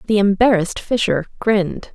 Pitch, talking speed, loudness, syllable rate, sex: 205 Hz, 125 wpm, -17 LUFS, 5.5 syllables/s, female